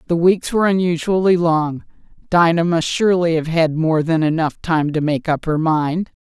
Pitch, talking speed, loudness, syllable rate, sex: 165 Hz, 185 wpm, -17 LUFS, 4.9 syllables/s, female